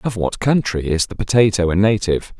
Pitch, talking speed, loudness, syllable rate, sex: 100 Hz, 200 wpm, -17 LUFS, 5.6 syllables/s, male